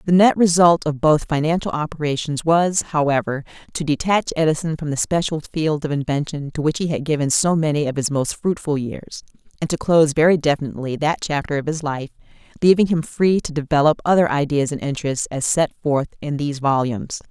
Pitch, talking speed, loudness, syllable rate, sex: 150 Hz, 190 wpm, -19 LUFS, 5.7 syllables/s, female